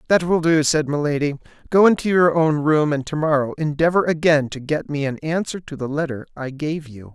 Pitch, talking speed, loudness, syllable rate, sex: 150 Hz, 210 wpm, -20 LUFS, 5.4 syllables/s, male